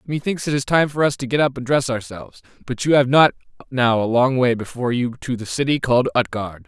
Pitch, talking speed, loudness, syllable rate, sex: 130 Hz, 250 wpm, -19 LUFS, 6.0 syllables/s, male